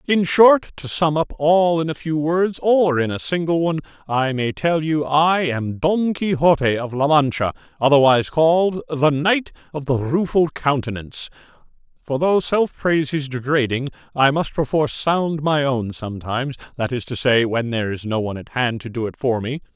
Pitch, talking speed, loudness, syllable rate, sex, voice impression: 145 Hz, 190 wpm, -19 LUFS, 5.0 syllables/s, male, masculine, very adult-like, slightly muffled, fluent, slightly mature, elegant, slightly sweet